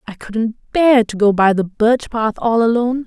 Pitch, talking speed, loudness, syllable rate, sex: 230 Hz, 215 wpm, -16 LUFS, 4.4 syllables/s, female